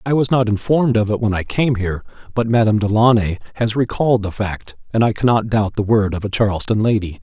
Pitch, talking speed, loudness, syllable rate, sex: 110 Hz, 225 wpm, -17 LUFS, 6.2 syllables/s, male